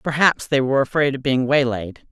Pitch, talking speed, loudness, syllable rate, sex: 135 Hz, 200 wpm, -19 LUFS, 5.3 syllables/s, female